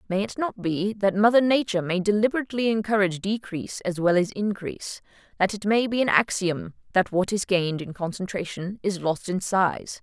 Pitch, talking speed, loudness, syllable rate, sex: 195 Hz, 180 wpm, -24 LUFS, 5.5 syllables/s, female